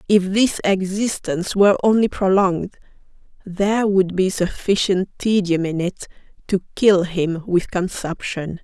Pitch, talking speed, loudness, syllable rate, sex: 190 Hz, 125 wpm, -19 LUFS, 4.5 syllables/s, female